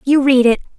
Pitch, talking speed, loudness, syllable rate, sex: 265 Hz, 230 wpm, -13 LUFS, 6.0 syllables/s, female